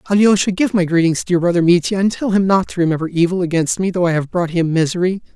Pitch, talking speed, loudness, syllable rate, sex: 180 Hz, 260 wpm, -16 LUFS, 6.7 syllables/s, male